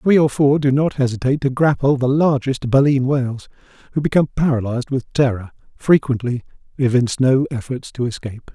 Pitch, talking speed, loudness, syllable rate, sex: 135 Hz, 155 wpm, -18 LUFS, 5.8 syllables/s, male